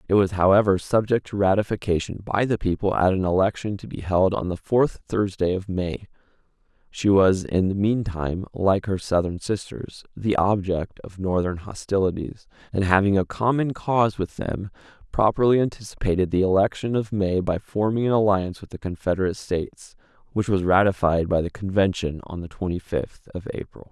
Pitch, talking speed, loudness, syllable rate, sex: 95 Hz, 175 wpm, -23 LUFS, 5.2 syllables/s, male